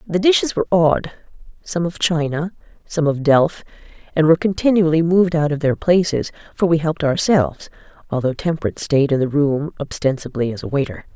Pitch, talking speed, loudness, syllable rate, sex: 160 Hz, 170 wpm, -18 LUFS, 5.8 syllables/s, female